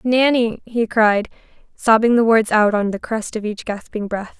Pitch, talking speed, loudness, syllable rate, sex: 220 Hz, 190 wpm, -18 LUFS, 4.5 syllables/s, female